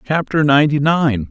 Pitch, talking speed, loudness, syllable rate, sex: 140 Hz, 140 wpm, -15 LUFS, 5.2 syllables/s, male